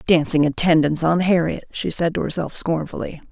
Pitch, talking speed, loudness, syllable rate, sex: 165 Hz, 165 wpm, -20 LUFS, 5.6 syllables/s, female